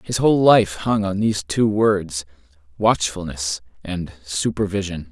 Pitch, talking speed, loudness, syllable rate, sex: 95 Hz, 130 wpm, -20 LUFS, 4.2 syllables/s, male